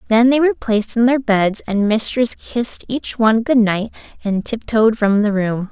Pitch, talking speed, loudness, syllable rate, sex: 225 Hz, 200 wpm, -16 LUFS, 5.0 syllables/s, female